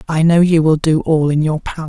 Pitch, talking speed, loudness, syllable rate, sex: 160 Hz, 285 wpm, -14 LUFS, 5.7 syllables/s, male